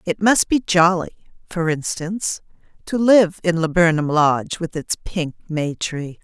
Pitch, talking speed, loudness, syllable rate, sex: 170 Hz, 155 wpm, -19 LUFS, 4.2 syllables/s, female